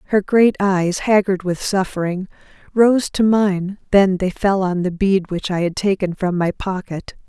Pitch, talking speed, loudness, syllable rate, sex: 190 Hz, 180 wpm, -18 LUFS, 4.3 syllables/s, female